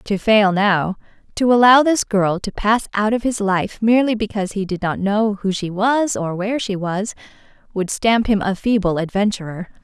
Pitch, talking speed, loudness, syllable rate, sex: 205 Hz, 195 wpm, -18 LUFS, 4.8 syllables/s, female